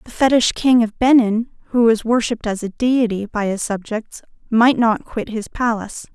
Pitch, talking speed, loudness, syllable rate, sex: 225 Hz, 185 wpm, -18 LUFS, 5.0 syllables/s, female